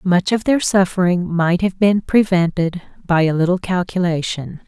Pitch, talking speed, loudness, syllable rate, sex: 180 Hz, 155 wpm, -17 LUFS, 4.6 syllables/s, female